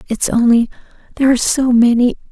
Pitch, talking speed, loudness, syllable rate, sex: 245 Hz, 130 wpm, -14 LUFS, 6.5 syllables/s, female